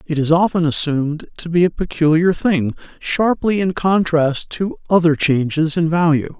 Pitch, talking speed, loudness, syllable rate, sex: 165 Hz, 160 wpm, -17 LUFS, 4.6 syllables/s, male